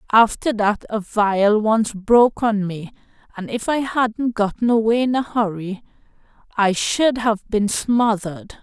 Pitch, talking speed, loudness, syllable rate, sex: 220 Hz, 155 wpm, -19 LUFS, 4.0 syllables/s, female